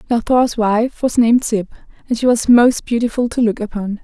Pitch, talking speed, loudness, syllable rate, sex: 230 Hz, 210 wpm, -15 LUFS, 5.3 syllables/s, female